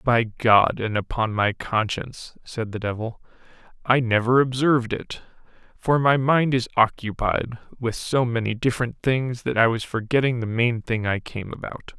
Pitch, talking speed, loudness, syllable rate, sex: 120 Hz, 165 wpm, -22 LUFS, 4.6 syllables/s, male